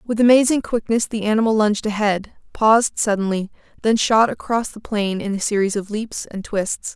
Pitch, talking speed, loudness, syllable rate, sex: 215 Hz, 180 wpm, -19 LUFS, 5.2 syllables/s, female